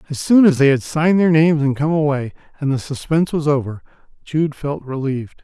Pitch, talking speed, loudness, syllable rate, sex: 145 Hz, 210 wpm, -17 LUFS, 6.0 syllables/s, male